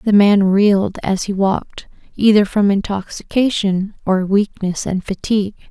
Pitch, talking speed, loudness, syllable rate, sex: 200 Hz, 135 wpm, -16 LUFS, 4.5 syllables/s, female